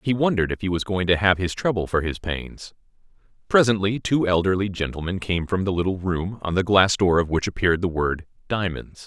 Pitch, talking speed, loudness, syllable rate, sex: 95 Hz, 210 wpm, -22 LUFS, 5.6 syllables/s, male